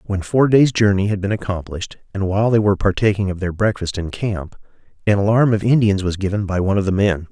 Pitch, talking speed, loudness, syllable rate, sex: 100 Hz, 230 wpm, -18 LUFS, 6.2 syllables/s, male